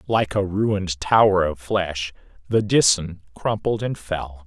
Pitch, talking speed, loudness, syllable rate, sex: 95 Hz, 150 wpm, -21 LUFS, 4.0 syllables/s, male